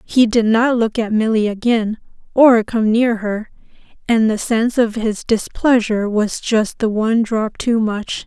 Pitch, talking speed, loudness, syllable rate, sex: 225 Hz, 175 wpm, -16 LUFS, 4.3 syllables/s, female